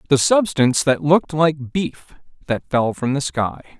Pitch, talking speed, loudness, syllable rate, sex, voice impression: 145 Hz, 175 wpm, -19 LUFS, 4.4 syllables/s, male, masculine, tensed, powerful, bright, clear, fluent, cool, intellectual, slightly friendly, wild, lively, slightly strict, slightly intense